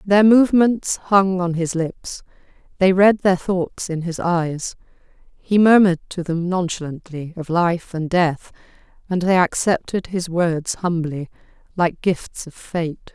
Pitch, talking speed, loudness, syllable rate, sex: 180 Hz, 145 wpm, -19 LUFS, 3.9 syllables/s, female